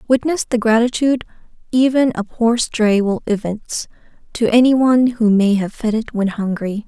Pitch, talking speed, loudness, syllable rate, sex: 225 Hz, 165 wpm, -17 LUFS, 5.1 syllables/s, female